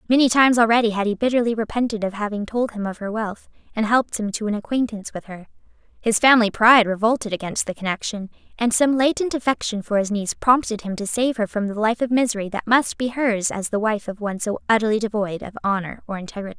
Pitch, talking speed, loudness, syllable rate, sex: 220 Hz, 225 wpm, -21 LUFS, 6.5 syllables/s, female